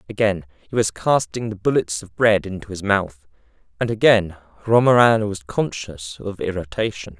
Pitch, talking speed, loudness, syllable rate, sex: 100 Hz, 150 wpm, -20 LUFS, 4.8 syllables/s, male